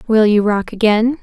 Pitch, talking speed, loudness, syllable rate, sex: 220 Hz, 195 wpm, -14 LUFS, 4.8 syllables/s, female